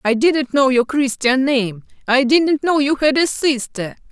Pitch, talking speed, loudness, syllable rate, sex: 265 Hz, 175 wpm, -16 LUFS, 4.1 syllables/s, female